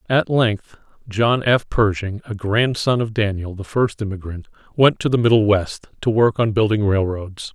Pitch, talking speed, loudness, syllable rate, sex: 110 Hz, 175 wpm, -19 LUFS, 4.5 syllables/s, male